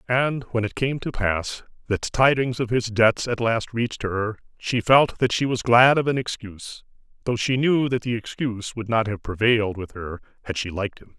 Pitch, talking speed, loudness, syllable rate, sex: 115 Hz, 215 wpm, -22 LUFS, 5.0 syllables/s, male